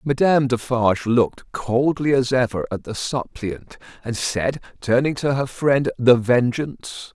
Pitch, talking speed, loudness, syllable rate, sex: 125 Hz, 145 wpm, -20 LUFS, 4.3 syllables/s, male